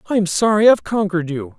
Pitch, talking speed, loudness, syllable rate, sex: 180 Hz, 190 wpm, -16 LUFS, 6.2 syllables/s, male